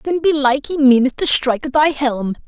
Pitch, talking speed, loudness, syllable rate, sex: 275 Hz, 220 wpm, -16 LUFS, 5.8 syllables/s, female